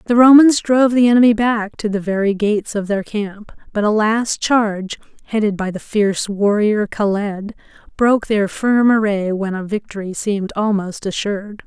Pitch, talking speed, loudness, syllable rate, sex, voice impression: 210 Hz, 170 wpm, -17 LUFS, 4.9 syllables/s, female, very feminine, adult-like, very thin, powerful, very bright, soft, very clear, fluent, slightly raspy, very cute, intellectual, very refreshing, very sincere, calm, very mature, friendly, very unique, elegant, slightly wild, very sweet, lively, kind